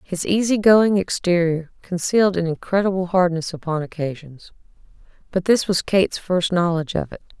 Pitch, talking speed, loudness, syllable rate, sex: 180 Hz, 145 wpm, -20 LUFS, 5.3 syllables/s, female